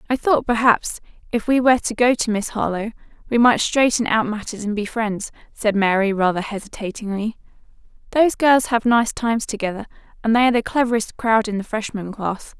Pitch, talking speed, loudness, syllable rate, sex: 225 Hz, 185 wpm, -20 LUFS, 5.7 syllables/s, female